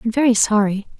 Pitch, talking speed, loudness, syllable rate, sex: 225 Hz, 180 wpm, -17 LUFS, 6.4 syllables/s, female